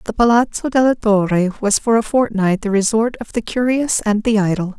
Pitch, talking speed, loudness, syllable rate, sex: 220 Hz, 200 wpm, -16 LUFS, 5.2 syllables/s, female